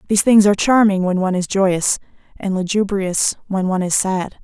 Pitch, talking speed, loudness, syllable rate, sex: 195 Hz, 190 wpm, -17 LUFS, 5.7 syllables/s, female